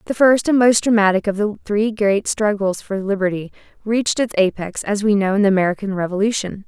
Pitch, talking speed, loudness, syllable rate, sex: 205 Hz, 200 wpm, -18 LUFS, 5.8 syllables/s, female